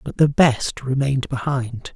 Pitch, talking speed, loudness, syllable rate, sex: 135 Hz, 155 wpm, -20 LUFS, 4.3 syllables/s, male